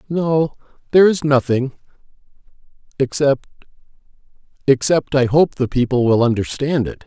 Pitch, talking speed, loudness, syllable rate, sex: 135 Hz, 95 wpm, -17 LUFS, 5.0 syllables/s, male